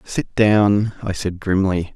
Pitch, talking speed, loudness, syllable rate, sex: 95 Hz, 155 wpm, -19 LUFS, 3.4 syllables/s, male